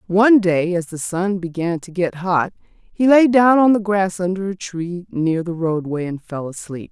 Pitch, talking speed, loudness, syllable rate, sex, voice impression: 185 Hz, 210 wpm, -18 LUFS, 4.4 syllables/s, female, very feminine, very young, very thin, slightly tensed, slightly weak, slightly bright, very soft, clear, fluent, raspy, very cute, very intellectual, very refreshing, sincere, very calm, very friendly, very reassuring, very unique, very elegant, slightly wild, very sweet, lively, very kind, modest, light